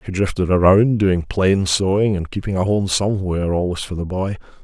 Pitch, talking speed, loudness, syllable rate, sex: 95 Hz, 195 wpm, -18 LUFS, 5.4 syllables/s, male